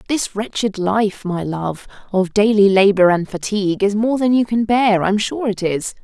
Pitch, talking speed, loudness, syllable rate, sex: 205 Hz, 210 wpm, -17 LUFS, 4.7 syllables/s, female